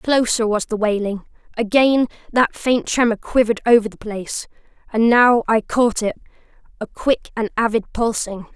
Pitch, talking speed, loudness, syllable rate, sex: 225 Hz, 145 wpm, -18 LUFS, 4.8 syllables/s, female